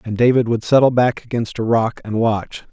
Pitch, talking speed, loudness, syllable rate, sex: 115 Hz, 220 wpm, -17 LUFS, 5.2 syllables/s, male